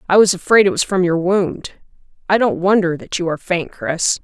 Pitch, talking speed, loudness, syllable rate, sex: 185 Hz, 225 wpm, -16 LUFS, 5.3 syllables/s, female